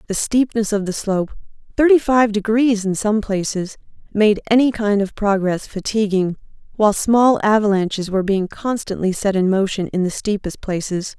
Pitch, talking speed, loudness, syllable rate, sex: 205 Hz, 150 wpm, -18 LUFS, 5.0 syllables/s, female